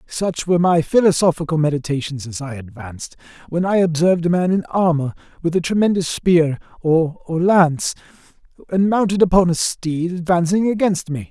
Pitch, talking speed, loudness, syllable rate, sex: 170 Hz, 155 wpm, -18 LUFS, 5.3 syllables/s, male